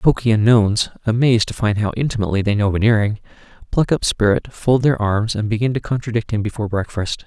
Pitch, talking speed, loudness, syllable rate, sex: 110 Hz, 190 wpm, -18 LUFS, 6.1 syllables/s, male